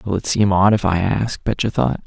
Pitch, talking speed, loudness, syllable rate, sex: 100 Hz, 260 wpm, -18 LUFS, 5.0 syllables/s, male